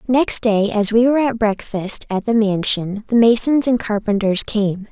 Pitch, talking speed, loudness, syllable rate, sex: 220 Hz, 185 wpm, -17 LUFS, 4.5 syllables/s, female